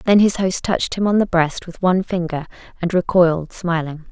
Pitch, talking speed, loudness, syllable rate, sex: 180 Hz, 205 wpm, -19 LUFS, 5.5 syllables/s, female